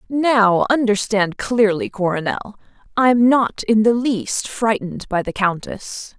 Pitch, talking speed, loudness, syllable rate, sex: 215 Hz, 125 wpm, -18 LUFS, 3.8 syllables/s, female